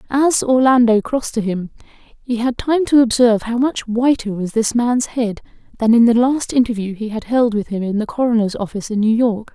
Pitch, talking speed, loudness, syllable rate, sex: 230 Hz, 215 wpm, -17 LUFS, 5.5 syllables/s, female